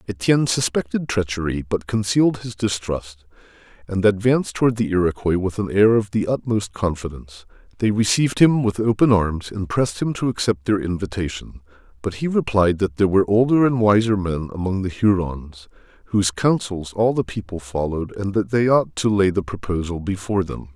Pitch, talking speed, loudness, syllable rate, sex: 100 Hz, 175 wpm, -20 LUFS, 5.6 syllables/s, male